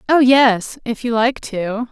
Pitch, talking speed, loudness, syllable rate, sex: 240 Hz, 190 wpm, -16 LUFS, 3.6 syllables/s, female